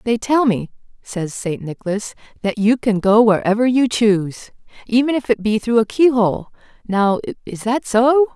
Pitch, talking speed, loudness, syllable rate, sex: 225 Hz, 180 wpm, -17 LUFS, 4.6 syllables/s, female